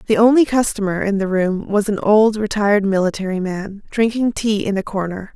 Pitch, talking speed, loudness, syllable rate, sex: 205 Hz, 190 wpm, -18 LUFS, 5.3 syllables/s, female